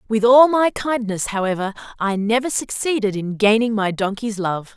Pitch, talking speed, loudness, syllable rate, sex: 220 Hz, 165 wpm, -19 LUFS, 4.9 syllables/s, female